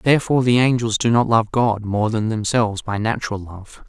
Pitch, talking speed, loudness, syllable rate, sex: 115 Hz, 200 wpm, -19 LUFS, 5.5 syllables/s, male